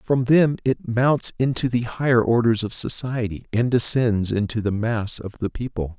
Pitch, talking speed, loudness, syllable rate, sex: 115 Hz, 180 wpm, -21 LUFS, 4.5 syllables/s, male